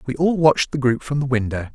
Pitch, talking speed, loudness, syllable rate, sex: 135 Hz, 275 wpm, -19 LUFS, 6.5 syllables/s, male